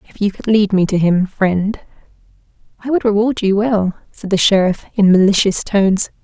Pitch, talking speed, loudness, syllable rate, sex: 200 Hz, 185 wpm, -15 LUFS, 5.1 syllables/s, female